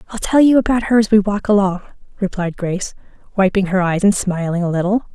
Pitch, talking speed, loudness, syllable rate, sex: 200 Hz, 210 wpm, -16 LUFS, 6.2 syllables/s, female